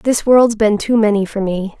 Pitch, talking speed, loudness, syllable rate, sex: 215 Hz, 235 wpm, -14 LUFS, 4.6 syllables/s, female